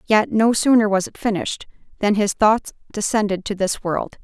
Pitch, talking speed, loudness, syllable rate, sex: 210 Hz, 185 wpm, -19 LUFS, 5.0 syllables/s, female